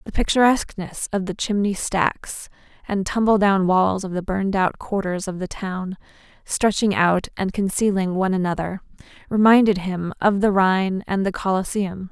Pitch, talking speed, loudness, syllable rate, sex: 195 Hz, 160 wpm, -21 LUFS, 4.9 syllables/s, female